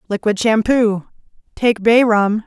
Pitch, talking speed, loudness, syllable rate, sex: 215 Hz, 95 wpm, -15 LUFS, 4.7 syllables/s, female